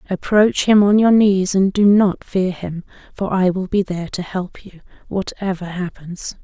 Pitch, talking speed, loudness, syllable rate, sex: 190 Hz, 185 wpm, -17 LUFS, 4.5 syllables/s, female